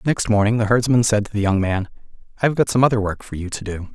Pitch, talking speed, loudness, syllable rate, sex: 110 Hz, 290 wpm, -19 LUFS, 6.6 syllables/s, male